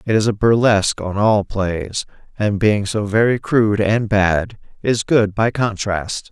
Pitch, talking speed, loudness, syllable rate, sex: 105 Hz, 170 wpm, -17 LUFS, 4.1 syllables/s, male